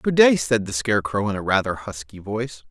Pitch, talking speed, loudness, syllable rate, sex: 110 Hz, 220 wpm, -21 LUFS, 5.7 syllables/s, male